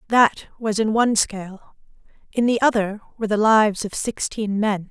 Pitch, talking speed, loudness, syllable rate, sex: 215 Hz, 170 wpm, -20 LUFS, 5.2 syllables/s, female